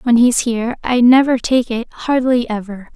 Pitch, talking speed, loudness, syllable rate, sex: 240 Hz, 160 wpm, -15 LUFS, 4.8 syllables/s, female